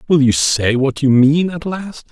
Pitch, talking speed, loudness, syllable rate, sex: 145 Hz, 225 wpm, -14 LUFS, 4.2 syllables/s, male